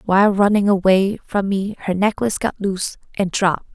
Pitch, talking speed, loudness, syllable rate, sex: 195 Hz, 175 wpm, -18 LUFS, 5.6 syllables/s, female